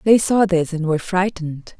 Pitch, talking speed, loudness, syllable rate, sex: 180 Hz, 200 wpm, -18 LUFS, 5.4 syllables/s, female